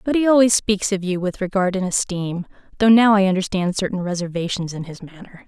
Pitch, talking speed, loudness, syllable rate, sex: 190 Hz, 210 wpm, -19 LUFS, 5.8 syllables/s, female